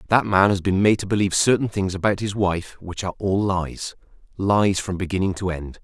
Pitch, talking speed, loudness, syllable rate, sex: 95 Hz, 205 wpm, -21 LUFS, 5.5 syllables/s, male